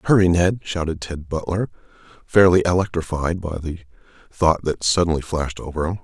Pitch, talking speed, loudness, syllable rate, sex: 85 Hz, 150 wpm, -21 LUFS, 5.6 syllables/s, male